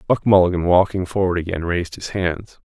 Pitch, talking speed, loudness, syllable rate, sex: 90 Hz, 180 wpm, -19 LUFS, 5.7 syllables/s, male